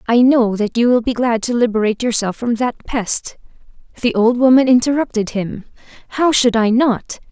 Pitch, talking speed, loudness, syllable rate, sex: 235 Hz, 180 wpm, -16 LUFS, 5.2 syllables/s, female